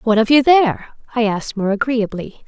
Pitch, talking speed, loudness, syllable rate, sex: 230 Hz, 195 wpm, -16 LUFS, 5.3 syllables/s, female